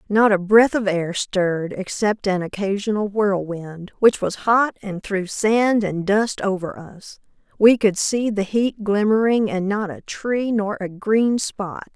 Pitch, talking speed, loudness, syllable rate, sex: 205 Hz, 170 wpm, -20 LUFS, 3.8 syllables/s, female